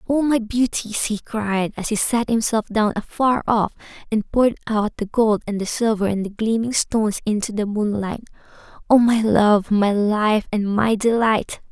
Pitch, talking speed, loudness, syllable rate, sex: 215 Hz, 180 wpm, -20 LUFS, 4.5 syllables/s, female